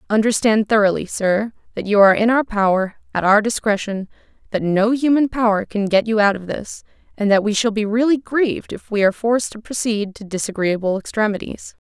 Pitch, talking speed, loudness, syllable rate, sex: 215 Hz, 190 wpm, -18 LUFS, 5.7 syllables/s, female